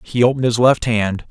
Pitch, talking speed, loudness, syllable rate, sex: 120 Hz, 230 wpm, -16 LUFS, 5.8 syllables/s, male